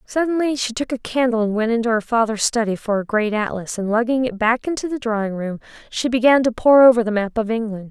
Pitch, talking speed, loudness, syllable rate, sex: 230 Hz, 245 wpm, -19 LUFS, 6.0 syllables/s, female